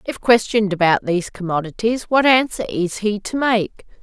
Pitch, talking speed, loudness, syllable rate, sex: 210 Hz, 165 wpm, -18 LUFS, 5.1 syllables/s, female